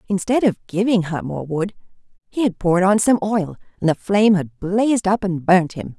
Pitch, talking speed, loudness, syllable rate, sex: 190 Hz, 210 wpm, -19 LUFS, 5.2 syllables/s, female